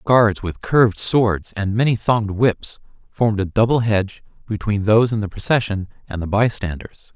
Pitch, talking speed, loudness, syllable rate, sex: 105 Hz, 170 wpm, -19 LUFS, 5.1 syllables/s, male